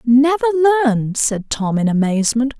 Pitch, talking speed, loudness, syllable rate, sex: 245 Hz, 140 wpm, -16 LUFS, 5.6 syllables/s, female